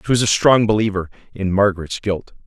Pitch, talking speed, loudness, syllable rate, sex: 100 Hz, 195 wpm, -18 LUFS, 6.0 syllables/s, male